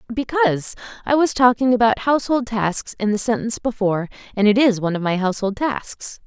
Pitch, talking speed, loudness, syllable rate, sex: 225 Hz, 180 wpm, -19 LUFS, 6.0 syllables/s, female